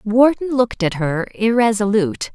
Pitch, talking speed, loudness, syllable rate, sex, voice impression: 220 Hz, 130 wpm, -17 LUFS, 4.8 syllables/s, female, very feminine, very adult-like, very middle-aged, very thin, tensed, powerful, very bright, dark, soft, very clear, very fluent, very cute, intellectual, very refreshing, very sincere, calm, friendly, reassuring, very unique, very elegant, slightly wild, sweet, very lively, kind, slightly modest, light